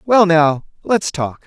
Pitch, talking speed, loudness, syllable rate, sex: 165 Hz, 125 wpm, -15 LUFS, 3.4 syllables/s, male